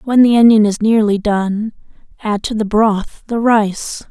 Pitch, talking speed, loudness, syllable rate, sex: 215 Hz, 175 wpm, -14 LUFS, 4.0 syllables/s, female